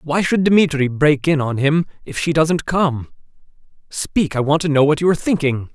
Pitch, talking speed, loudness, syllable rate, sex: 150 Hz, 210 wpm, -17 LUFS, 4.9 syllables/s, male